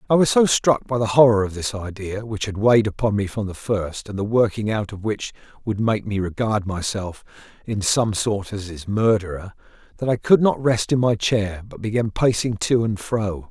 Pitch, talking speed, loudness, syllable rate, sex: 105 Hz, 220 wpm, -21 LUFS, 5.0 syllables/s, male